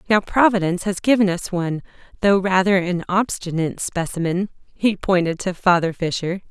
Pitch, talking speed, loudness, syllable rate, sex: 185 Hz, 150 wpm, -20 LUFS, 5.4 syllables/s, female